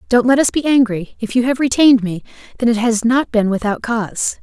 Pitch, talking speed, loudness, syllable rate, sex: 235 Hz, 230 wpm, -16 LUFS, 5.7 syllables/s, female